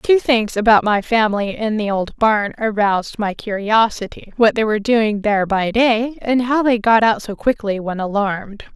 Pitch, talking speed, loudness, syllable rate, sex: 215 Hz, 185 wpm, -17 LUFS, 4.8 syllables/s, female